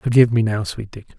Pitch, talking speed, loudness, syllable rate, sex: 110 Hz, 255 wpm, -18 LUFS, 6.7 syllables/s, male